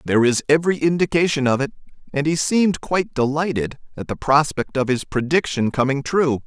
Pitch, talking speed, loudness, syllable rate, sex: 145 Hz, 175 wpm, -20 LUFS, 5.8 syllables/s, male